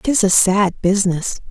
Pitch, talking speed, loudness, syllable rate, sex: 195 Hz, 160 wpm, -16 LUFS, 4.3 syllables/s, female